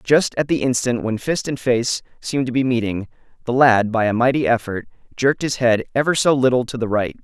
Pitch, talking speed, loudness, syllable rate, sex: 125 Hz, 225 wpm, -19 LUFS, 5.7 syllables/s, male